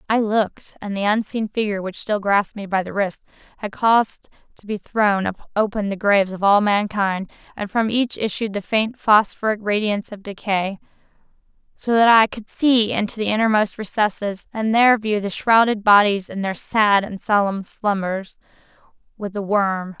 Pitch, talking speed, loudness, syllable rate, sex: 205 Hz, 175 wpm, -20 LUFS, 4.9 syllables/s, female